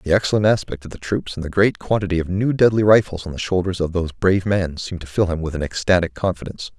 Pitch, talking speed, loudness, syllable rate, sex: 90 Hz, 255 wpm, -20 LUFS, 6.8 syllables/s, male